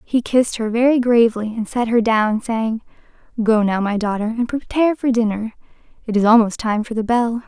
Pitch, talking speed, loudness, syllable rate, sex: 225 Hz, 200 wpm, -18 LUFS, 5.4 syllables/s, female